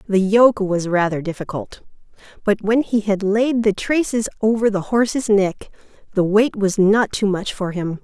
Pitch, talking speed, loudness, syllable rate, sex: 205 Hz, 180 wpm, -18 LUFS, 4.5 syllables/s, female